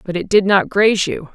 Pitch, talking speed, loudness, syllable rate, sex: 195 Hz, 270 wpm, -15 LUFS, 5.7 syllables/s, female